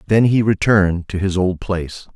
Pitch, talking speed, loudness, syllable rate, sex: 95 Hz, 195 wpm, -17 LUFS, 5.3 syllables/s, male